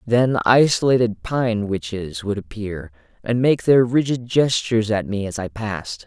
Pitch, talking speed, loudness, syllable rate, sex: 110 Hz, 160 wpm, -20 LUFS, 4.5 syllables/s, male